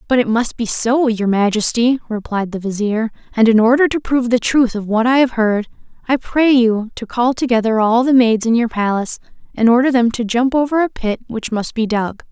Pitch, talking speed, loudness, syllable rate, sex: 235 Hz, 225 wpm, -16 LUFS, 5.3 syllables/s, female